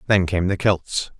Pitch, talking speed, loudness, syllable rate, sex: 90 Hz, 200 wpm, -21 LUFS, 4.1 syllables/s, male